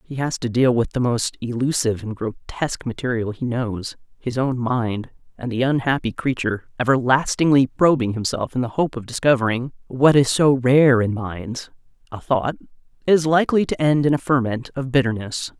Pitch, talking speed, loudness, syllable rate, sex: 125 Hz, 170 wpm, -20 LUFS, 5.2 syllables/s, female